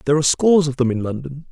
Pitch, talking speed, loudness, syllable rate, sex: 145 Hz, 275 wpm, -18 LUFS, 8.1 syllables/s, male